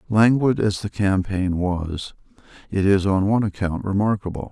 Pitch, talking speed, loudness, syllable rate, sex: 100 Hz, 145 wpm, -21 LUFS, 4.8 syllables/s, male